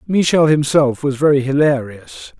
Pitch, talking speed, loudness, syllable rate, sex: 135 Hz, 125 wpm, -15 LUFS, 4.5 syllables/s, male